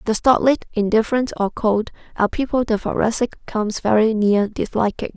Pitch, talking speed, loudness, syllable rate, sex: 220 Hz, 150 wpm, -19 LUFS, 5.6 syllables/s, female